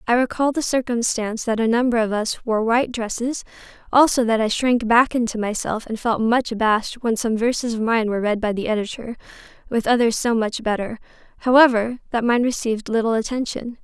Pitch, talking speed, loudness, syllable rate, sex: 230 Hz, 185 wpm, -20 LUFS, 5.8 syllables/s, female